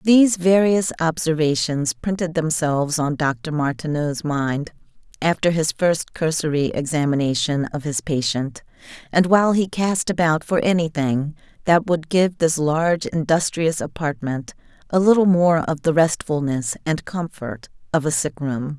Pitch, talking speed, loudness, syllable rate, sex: 155 Hz, 135 wpm, -20 LUFS, 4.4 syllables/s, female